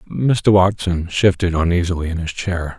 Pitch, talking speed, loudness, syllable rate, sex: 90 Hz, 150 wpm, -18 LUFS, 4.7 syllables/s, male